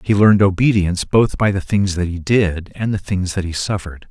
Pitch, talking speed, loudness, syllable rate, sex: 95 Hz, 235 wpm, -17 LUFS, 5.5 syllables/s, male